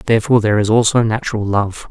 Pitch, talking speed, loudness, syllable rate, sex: 110 Hz, 190 wpm, -15 LUFS, 7.0 syllables/s, male